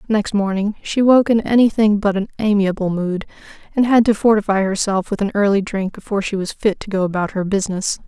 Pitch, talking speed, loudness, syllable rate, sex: 205 Hz, 210 wpm, -18 LUFS, 5.9 syllables/s, female